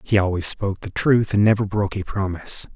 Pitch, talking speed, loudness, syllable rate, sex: 100 Hz, 215 wpm, -21 LUFS, 6.1 syllables/s, male